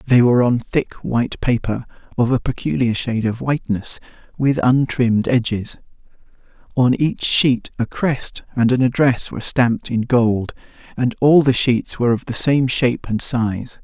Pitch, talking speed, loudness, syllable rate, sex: 120 Hz, 165 wpm, -18 LUFS, 4.8 syllables/s, male